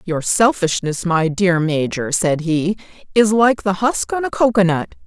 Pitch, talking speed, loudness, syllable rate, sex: 185 Hz, 165 wpm, -17 LUFS, 4.2 syllables/s, female